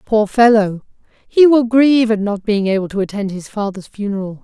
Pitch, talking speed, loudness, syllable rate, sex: 215 Hz, 190 wpm, -15 LUFS, 5.2 syllables/s, female